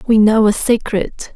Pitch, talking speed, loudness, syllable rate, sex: 220 Hz, 175 wpm, -14 LUFS, 4.1 syllables/s, female